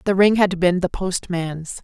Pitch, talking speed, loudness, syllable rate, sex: 180 Hz, 195 wpm, -19 LUFS, 4.1 syllables/s, female